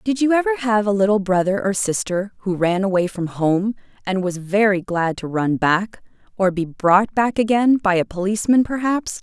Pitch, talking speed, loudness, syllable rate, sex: 200 Hz, 195 wpm, -19 LUFS, 5.0 syllables/s, female